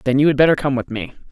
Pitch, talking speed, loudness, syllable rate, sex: 140 Hz, 320 wpm, -17 LUFS, 7.6 syllables/s, male